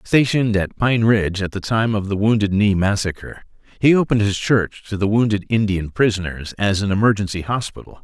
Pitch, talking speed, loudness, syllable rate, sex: 105 Hz, 185 wpm, -19 LUFS, 5.7 syllables/s, male